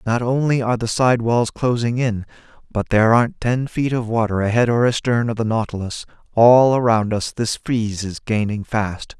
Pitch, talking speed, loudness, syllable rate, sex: 115 Hz, 190 wpm, -19 LUFS, 5.1 syllables/s, male